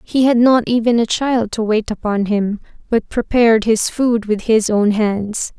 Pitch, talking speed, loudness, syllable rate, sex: 225 Hz, 195 wpm, -16 LUFS, 4.3 syllables/s, female